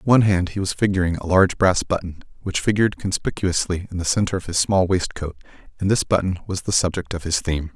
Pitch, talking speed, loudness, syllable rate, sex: 90 Hz, 225 wpm, -21 LUFS, 6.4 syllables/s, male